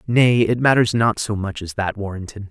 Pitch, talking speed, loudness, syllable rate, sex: 105 Hz, 215 wpm, -19 LUFS, 5.1 syllables/s, male